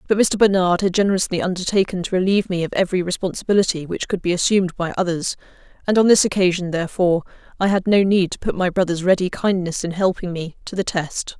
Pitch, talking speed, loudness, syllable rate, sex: 185 Hz, 205 wpm, -19 LUFS, 6.5 syllables/s, female